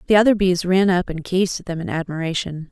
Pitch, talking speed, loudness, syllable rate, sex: 180 Hz, 245 wpm, -20 LUFS, 5.9 syllables/s, female